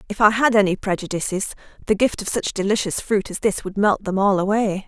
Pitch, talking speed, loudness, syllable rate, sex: 200 Hz, 220 wpm, -20 LUFS, 5.7 syllables/s, female